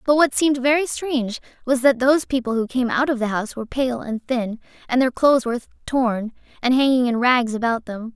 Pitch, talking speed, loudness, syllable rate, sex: 250 Hz, 220 wpm, -20 LUFS, 5.9 syllables/s, female